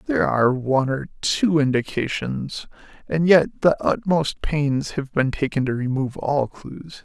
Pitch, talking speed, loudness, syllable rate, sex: 140 Hz, 155 wpm, -21 LUFS, 4.6 syllables/s, male